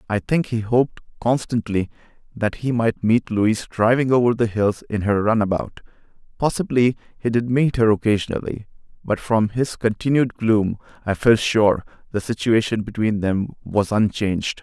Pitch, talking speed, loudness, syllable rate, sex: 110 Hz, 150 wpm, -20 LUFS, 4.8 syllables/s, male